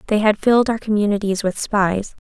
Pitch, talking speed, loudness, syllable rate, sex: 210 Hz, 185 wpm, -18 LUFS, 5.5 syllables/s, female